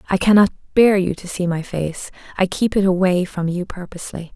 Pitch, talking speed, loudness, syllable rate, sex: 185 Hz, 205 wpm, -18 LUFS, 5.5 syllables/s, female